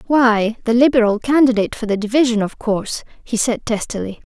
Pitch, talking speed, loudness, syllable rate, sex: 230 Hz, 165 wpm, -17 LUFS, 5.7 syllables/s, female